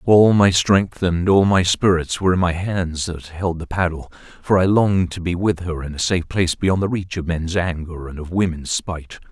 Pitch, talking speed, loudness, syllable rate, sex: 90 Hz, 225 wpm, -19 LUFS, 5.1 syllables/s, male